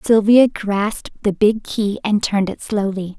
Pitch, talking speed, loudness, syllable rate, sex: 210 Hz, 170 wpm, -18 LUFS, 4.5 syllables/s, female